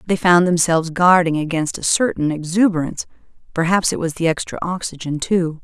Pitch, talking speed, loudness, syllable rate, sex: 170 Hz, 160 wpm, -18 LUFS, 5.6 syllables/s, female